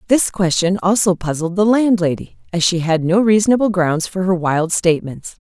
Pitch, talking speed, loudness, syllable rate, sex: 185 Hz, 175 wpm, -16 LUFS, 5.2 syllables/s, female